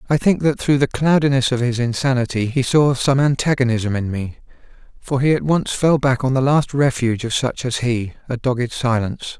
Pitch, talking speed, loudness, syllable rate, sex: 130 Hz, 200 wpm, -18 LUFS, 5.3 syllables/s, male